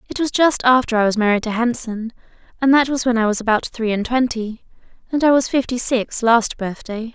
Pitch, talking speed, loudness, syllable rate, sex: 235 Hz, 220 wpm, -18 LUFS, 5.4 syllables/s, female